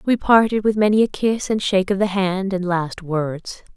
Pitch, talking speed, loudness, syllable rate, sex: 195 Hz, 225 wpm, -19 LUFS, 4.8 syllables/s, female